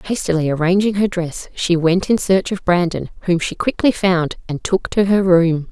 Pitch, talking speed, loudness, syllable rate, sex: 180 Hz, 200 wpm, -17 LUFS, 4.7 syllables/s, female